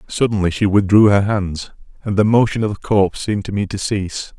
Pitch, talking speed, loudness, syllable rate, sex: 100 Hz, 220 wpm, -17 LUFS, 5.9 syllables/s, male